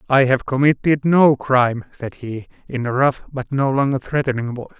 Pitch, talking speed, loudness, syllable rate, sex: 130 Hz, 190 wpm, -18 LUFS, 5.2 syllables/s, male